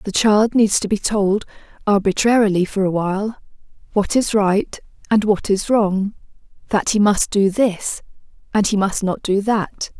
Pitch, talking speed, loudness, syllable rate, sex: 205 Hz, 170 wpm, -18 LUFS, 4.4 syllables/s, female